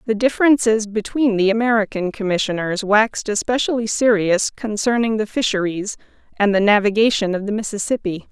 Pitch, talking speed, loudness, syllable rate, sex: 215 Hz, 130 wpm, -18 LUFS, 5.6 syllables/s, female